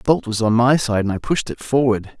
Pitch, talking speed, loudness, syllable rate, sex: 120 Hz, 300 wpm, -18 LUFS, 5.9 syllables/s, male